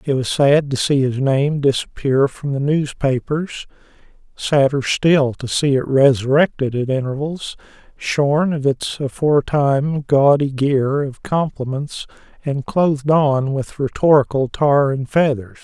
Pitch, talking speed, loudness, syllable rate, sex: 140 Hz, 135 wpm, -17 LUFS, 4.1 syllables/s, male